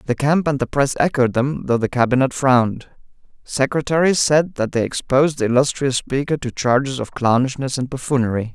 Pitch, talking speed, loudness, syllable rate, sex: 135 Hz, 170 wpm, -18 LUFS, 5.5 syllables/s, male